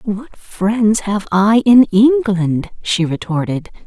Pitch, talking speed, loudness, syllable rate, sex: 205 Hz, 125 wpm, -15 LUFS, 3.2 syllables/s, female